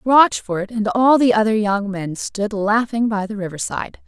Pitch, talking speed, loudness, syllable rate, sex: 215 Hz, 190 wpm, -18 LUFS, 4.3 syllables/s, female